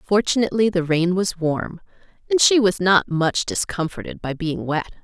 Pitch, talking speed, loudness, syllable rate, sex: 185 Hz, 165 wpm, -20 LUFS, 4.9 syllables/s, female